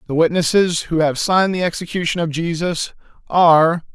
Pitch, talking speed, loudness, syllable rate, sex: 165 Hz, 150 wpm, -17 LUFS, 5.4 syllables/s, male